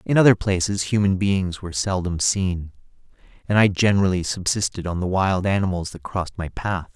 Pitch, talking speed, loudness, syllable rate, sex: 95 Hz, 175 wpm, -21 LUFS, 5.4 syllables/s, male